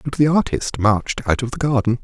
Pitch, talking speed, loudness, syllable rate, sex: 125 Hz, 235 wpm, -19 LUFS, 5.9 syllables/s, male